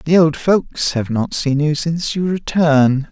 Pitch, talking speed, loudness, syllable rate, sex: 155 Hz, 190 wpm, -16 LUFS, 4.0 syllables/s, male